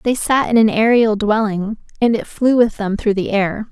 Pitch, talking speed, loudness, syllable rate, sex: 220 Hz, 225 wpm, -16 LUFS, 4.7 syllables/s, female